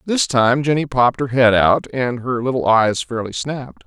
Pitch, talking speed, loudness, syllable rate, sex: 125 Hz, 200 wpm, -17 LUFS, 4.8 syllables/s, male